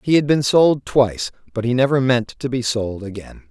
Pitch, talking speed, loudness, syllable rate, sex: 125 Hz, 225 wpm, -18 LUFS, 5.1 syllables/s, male